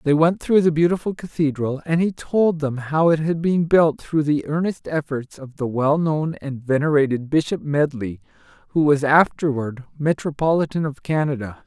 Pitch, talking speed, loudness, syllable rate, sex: 150 Hz, 165 wpm, -20 LUFS, 4.8 syllables/s, male